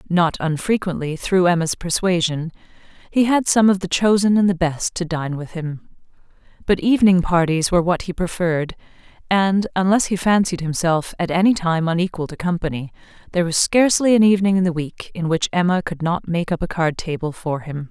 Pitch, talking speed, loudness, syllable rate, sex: 175 Hz, 190 wpm, -19 LUFS, 5.5 syllables/s, female